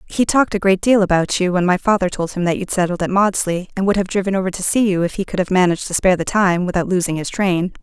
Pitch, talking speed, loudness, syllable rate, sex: 185 Hz, 290 wpm, -17 LUFS, 6.8 syllables/s, female